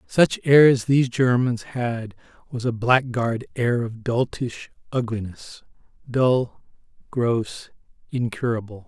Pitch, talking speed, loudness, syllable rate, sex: 120 Hz, 100 wpm, -22 LUFS, 3.7 syllables/s, male